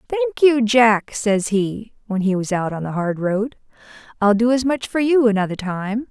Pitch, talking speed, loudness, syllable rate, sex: 225 Hz, 205 wpm, -19 LUFS, 5.0 syllables/s, female